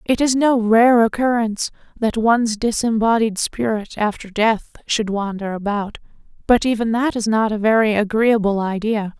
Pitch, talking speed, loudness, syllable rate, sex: 220 Hz, 150 wpm, -18 LUFS, 4.7 syllables/s, female